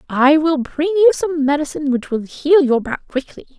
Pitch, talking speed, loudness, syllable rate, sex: 295 Hz, 200 wpm, -17 LUFS, 4.9 syllables/s, female